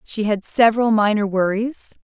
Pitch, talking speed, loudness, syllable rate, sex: 215 Hz, 145 wpm, -18 LUFS, 4.9 syllables/s, female